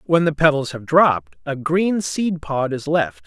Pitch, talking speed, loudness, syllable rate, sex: 150 Hz, 200 wpm, -19 LUFS, 4.3 syllables/s, male